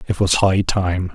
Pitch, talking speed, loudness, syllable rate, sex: 90 Hz, 210 wpm, -18 LUFS, 4.0 syllables/s, male